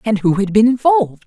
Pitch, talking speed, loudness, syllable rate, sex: 215 Hz, 240 wpm, -14 LUFS, 6.1 syllables/s, female